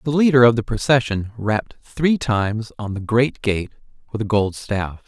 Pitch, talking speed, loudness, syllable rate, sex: 115 Hz, 190 wpm, -20 LUFS, 4.8 syllables/s, male